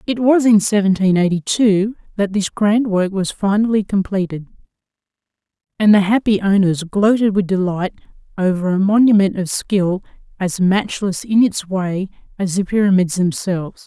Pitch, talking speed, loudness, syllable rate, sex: 195 Hz, 145 wpm, -16 LUFS, 4.8 syllables/s, female